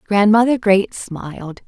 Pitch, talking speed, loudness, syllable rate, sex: 205 Hz, 110 wpm, -15 LUFS, 4.0 syllables/s, female